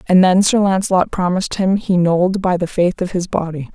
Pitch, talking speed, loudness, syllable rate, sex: 185 Hz, 225 wpm, -16 LUFS, 5.3 syllables/s, female